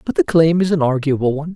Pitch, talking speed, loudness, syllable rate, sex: 150 Hz, 270 wpm, -16 LUFS, 6.9 syllables/s, male